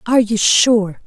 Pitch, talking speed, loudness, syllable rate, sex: 215 Hz, 170 wpm, -14 LUFS, 4.4 syllables/s, female